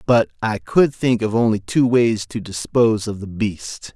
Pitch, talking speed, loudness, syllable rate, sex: 110 Hz, 195 wpm, -19 LUFS, 4.4 syllables/s, male